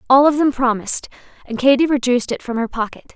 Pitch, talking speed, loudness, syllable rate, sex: 250 Hz, 210 wpm, -17 LUFS, 6.5 syllables/s, female